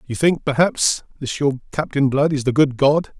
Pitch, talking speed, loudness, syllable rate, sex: 140 Hz, 205 wpm, -19 LUFS, 4.9 syllables/s, male